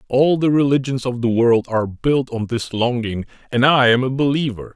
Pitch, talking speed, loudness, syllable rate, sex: 125 Hz, 200 wpm, -18 LUFS, 5.2 syllables/s, male